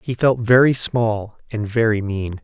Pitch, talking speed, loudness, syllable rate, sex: 115 Hz, 175 wpm, -18 LUFS, 4.1 syllables/s, male